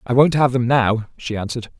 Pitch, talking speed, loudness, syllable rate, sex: 120 Hz, 235 wpm, -18 LUFS, 5.8 syllables/s, male